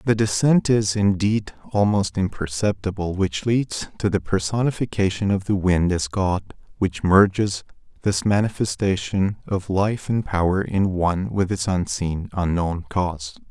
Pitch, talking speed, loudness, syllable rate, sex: 95 Hz, 140 wpm, -22 LUFS, 4.4 syllables/s, male